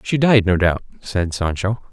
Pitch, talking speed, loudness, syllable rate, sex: 100 Hz, 190 wpm, -18 LUFS, 4.4 syllables/s, male